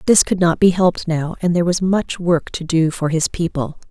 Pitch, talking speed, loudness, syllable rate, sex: 170 Hz, 260 wpm, -17 LUFS, 5.6 syllables/s, female